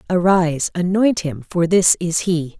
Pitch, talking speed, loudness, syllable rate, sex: 175 Hz, 160 wpm, -17 LUFS, 4.4 syllables/s, female